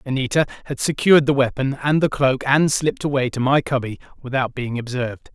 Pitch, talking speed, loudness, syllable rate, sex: 135 Hz, 190 wpm, -20 LUFS, 5.9 syllables/s, male